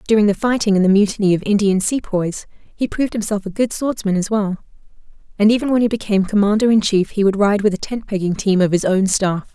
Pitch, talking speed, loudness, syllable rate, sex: 205 Hz, 235 wpm, -17 LUFS, 6.2 syllables/s, female